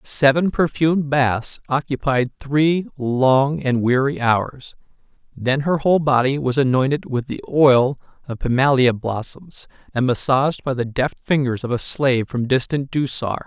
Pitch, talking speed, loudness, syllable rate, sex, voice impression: 135 Hz, 145 wpm, -19 LUFS, 4.3 syllables/s, male, masculine, slightly adult-like, clear, intellectual, calm